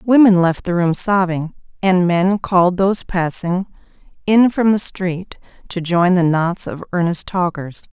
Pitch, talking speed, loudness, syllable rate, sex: 180 Hz, 160 wpm, -16 LUFS, 4.2 syllables/s, female